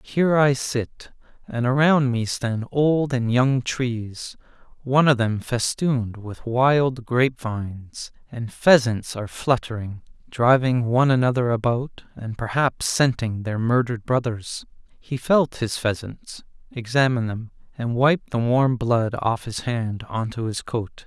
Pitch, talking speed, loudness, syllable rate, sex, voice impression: 120 Hz, 140 wpm, -22 LUFS, 4.0 syllables/s, male, masculine, adult-like, bright, fluent, refreshing, calm, friendly, reassuring, kind